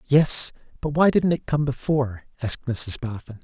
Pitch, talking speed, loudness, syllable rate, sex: 130 Hz, 175 wpm, -22 LUFS, 5.0 syllables/s, male